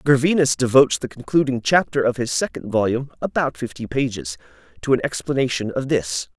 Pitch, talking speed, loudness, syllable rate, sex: 130 Hz, 160 wpm, -20 LUFS, 5.8 syllables/s, male